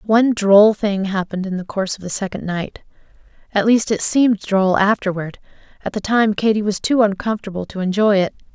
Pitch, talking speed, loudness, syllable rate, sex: 200 Hz, 185 wpm, -18 LUFS, 5.7 syllables/s, female